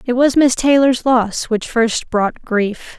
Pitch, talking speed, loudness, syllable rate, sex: 240 Hz, 180 wpm, -15 LUFS, 3.5 syllables/s, female